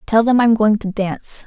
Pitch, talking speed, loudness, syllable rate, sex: 215 Hz, 245 wpm, -16 LUFS, 5.2 syllables/s, female